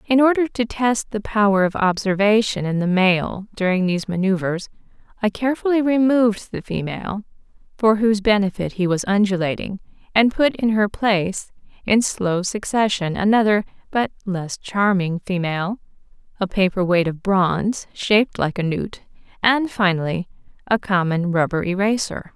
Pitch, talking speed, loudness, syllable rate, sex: 200 Hz, 140 wpm, -20 LUFS, 4.9 syllables/s, female